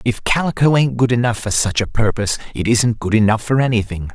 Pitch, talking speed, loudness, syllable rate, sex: 115 Hz, 215 wpm, -17 LUFS, 5.9 syllables/s, male